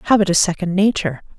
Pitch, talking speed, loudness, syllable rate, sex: 185 Hz, 175 wpm, -17 LUFS, 7.6 syllables/s, female